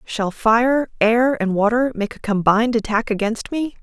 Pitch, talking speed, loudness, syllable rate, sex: 230 Hz, 175 wpm, -19 LUFS, 4.5 syllables/s, female